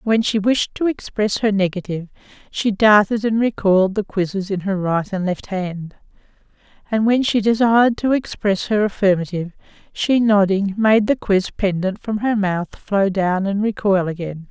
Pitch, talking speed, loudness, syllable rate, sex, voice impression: 200 Hz, 170 wpm, -18 LUFS, 4.8 syllables/s, female, feminine, middle-aged, slightly tensed, powerful, slightly soft, slightly muffled, slightly raspy, calm, friendly, slightly reassuring, slightly strict, slightly sharp